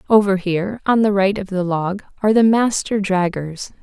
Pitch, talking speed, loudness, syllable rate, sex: 195 Hz, 190 wpm, -18 LUFS, 5.1 syllables/s, female